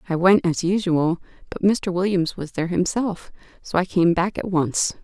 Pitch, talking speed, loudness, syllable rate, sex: 180 Hz, 190 wpm, -21 LUFS, 4.8 syllables/s, female